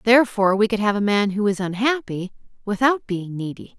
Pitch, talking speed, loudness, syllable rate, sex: 210 Hz, 190 wpm, -21 LUFS, 5.7 syllables/s, female